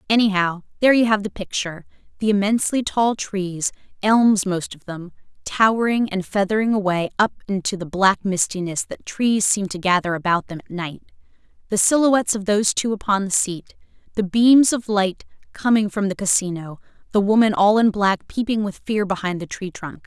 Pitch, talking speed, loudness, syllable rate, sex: 200 Hz, 180 wpm, -20 LUFS, 5.2 syllables/s, female